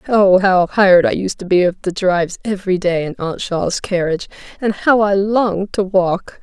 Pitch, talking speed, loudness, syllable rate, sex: 190 Hz, 205 wpm, -16 LUFS, 5.0 syllables/s, female